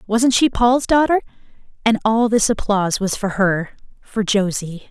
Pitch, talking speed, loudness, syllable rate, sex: 220 Hz, 145 wpm, -18 LUFS, 4.5 syllables/s, female